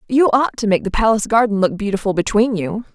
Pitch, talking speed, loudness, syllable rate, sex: 215 Hz, 225 wpm, -17 LUFS, 6.3 syllables/s, female